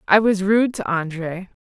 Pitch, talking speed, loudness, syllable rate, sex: 195 Hz, 185 wpm, -20 LUFS, 4.4 syllables/s, female